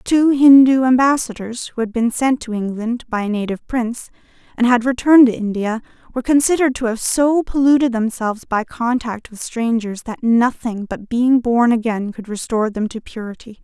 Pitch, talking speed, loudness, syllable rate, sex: 235 Hz, 175 wpm, -17 LUFS, 5.3 syllables/s, female